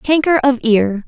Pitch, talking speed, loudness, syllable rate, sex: 255 Hz, 165 wpm, -14 LUFS, 4.0 syllables/s, female